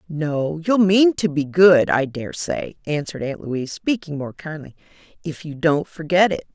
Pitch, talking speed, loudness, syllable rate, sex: 160 Hz, 175 wpm, -20 LUFS, 4.6 syllables/s, female